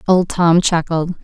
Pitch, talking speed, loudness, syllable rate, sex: 170 Hz, 145 wpm, -15 LUFS, 3.9 syllables/s, female